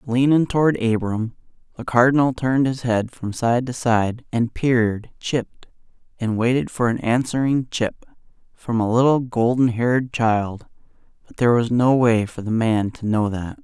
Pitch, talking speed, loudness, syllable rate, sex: 120 Hz, 165 wpm, -20 LUFS, 4.7 syllables/s, male